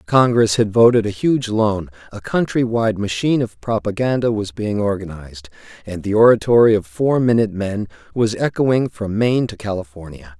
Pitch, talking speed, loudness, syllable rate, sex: 105 Hz, 160 wpm, -18 LUFS, 5.2 syllables/s, male